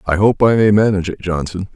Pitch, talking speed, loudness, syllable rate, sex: 95 Hz, 240 wpm, -15 LUFS, 6.4 syllables/s, male